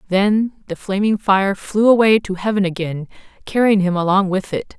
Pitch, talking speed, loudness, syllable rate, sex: 195 Hz, 175 wpm, -17 LUFS, 4.8 syllables/s, female